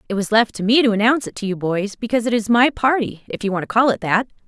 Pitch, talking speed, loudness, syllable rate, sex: 220 Hz, 310 wpm, -18 LUFS, 6.9 syllables/s, female